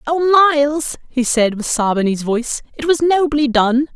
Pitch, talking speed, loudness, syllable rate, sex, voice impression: 270 Hz, 195 wpm, -16 LUFS, 4.8 syllables/s, female, very feminine, very adult-like, middle-aged, very thin, very tensed, very powerful, bright, very hard, very clear, very fluent, slightly cool, slightly intellectual, very refreshing, slightly sincere, very unique, slightly elegant, wild, very strict, very intense, very sharp, light